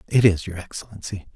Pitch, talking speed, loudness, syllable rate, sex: 95 Hz, 175 wpm, -24 LUFS, 6.3 syllables/s, male